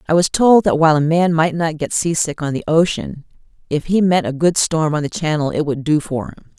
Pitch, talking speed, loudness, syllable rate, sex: 160 Hz, 255 wpm, -17 LUFS, 5.6 syllables/s, female